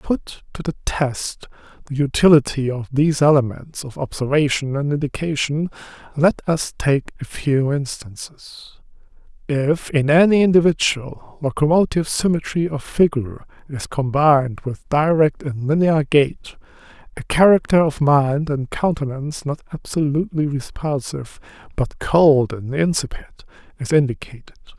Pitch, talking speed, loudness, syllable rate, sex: 145 Hz, 120 wpm, -19 LUFS, 4.7 syllables/s, male